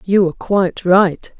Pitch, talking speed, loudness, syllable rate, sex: 185 Hz, 170 wpm, -15 LUFS, 4.7 syllables/s, female